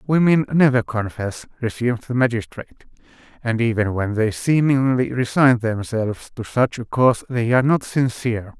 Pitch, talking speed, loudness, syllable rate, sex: 120 Hz, 145 wpm, -20 LUFS, 5.1 syllables/s, male